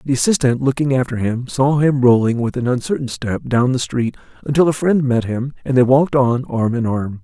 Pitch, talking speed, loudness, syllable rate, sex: 130 Hz, 225 wpm, -17 LUFS, 5.4 syllables/s, male